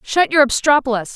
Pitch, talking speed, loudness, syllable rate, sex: 270 Hz, 155 wpm, -15 LUFS, 5.5 syllables/s, female